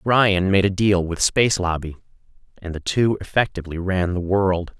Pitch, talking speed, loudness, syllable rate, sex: 95 Hz, 175 wpm, -20 LUFS, 5.0 syllables/s, male